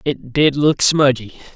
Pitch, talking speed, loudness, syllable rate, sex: 140 Hz, 155 wpm, -15 LUFS, 3.8 syllables/s, male